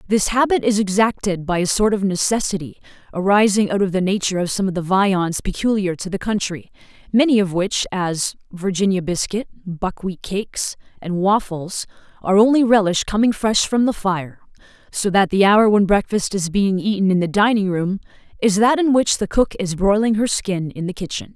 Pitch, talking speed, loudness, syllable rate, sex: 195 Hz, 190 wpm, -18 LUFS, 5.2 syllables/s, female